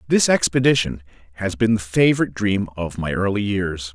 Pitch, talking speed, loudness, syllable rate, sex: 100 Hz, 165 wpm, -20 LUFS, 5.4 syllables/s, male